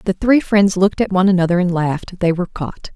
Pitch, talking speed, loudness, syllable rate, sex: 185 Hz, 245 wpm, -16 LUFS, 6.4 syllables/s, female